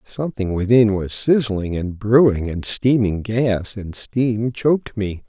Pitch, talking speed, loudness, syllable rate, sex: 110 Hz, 150 wpm, -19 LUFS, 3.9 syllables/s, male